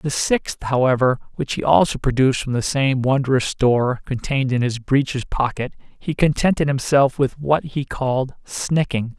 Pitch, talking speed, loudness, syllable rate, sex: 135 Hz, 165 wpm, -20 LUFS, 4.7 syllables/s, male